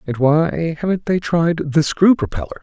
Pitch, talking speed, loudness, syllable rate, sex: 155 Hz, 185 wpm, -17 LUFS, 4.8 syllables/s, male